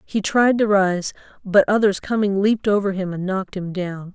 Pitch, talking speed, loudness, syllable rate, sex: 195 Hz, 205 wpm, -20 LUFS, 5.2 syllables/s, female